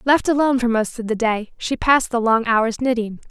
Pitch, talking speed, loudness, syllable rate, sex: 235 Hz, 235 wpm, -19 LUFS, 5.5 syllables/s, female